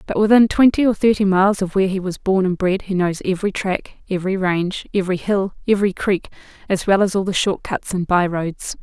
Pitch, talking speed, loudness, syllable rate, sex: 190 Hz, 225 wpm, -18 LUFS, 6.0 syllables/s, female